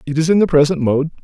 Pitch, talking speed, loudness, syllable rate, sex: 155 Hz, 290 wpm, -15 LUFS, 7.0 syllables/s, male